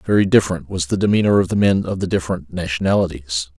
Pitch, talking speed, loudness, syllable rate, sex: 90 Hz, 200 wpm, -18 LUFS, 6.7 syllables/s, male